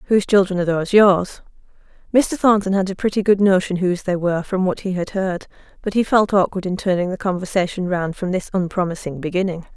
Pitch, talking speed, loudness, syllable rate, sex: 190 Hz, 195 wpm, -19 LUFS, 6.2 syllables/s, female